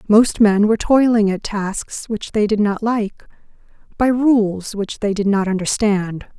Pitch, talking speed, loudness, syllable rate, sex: 210 Hz, 170 wpm, -17 LUFS, 4.1 syllables/s, female